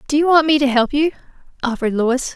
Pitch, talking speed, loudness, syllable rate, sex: 275 Hz, 230 wpm, -17 LUFS, 6.6 syllables/s, female